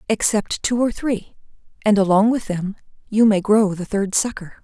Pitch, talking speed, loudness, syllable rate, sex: 210 Hz, 180 wpm, -19 LUFS, 4.7 syllables/s, female